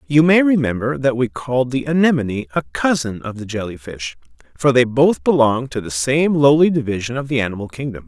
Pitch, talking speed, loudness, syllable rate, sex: 130 Hz, 200 wpm, -17 LUFS, 5.6 syllables/s, male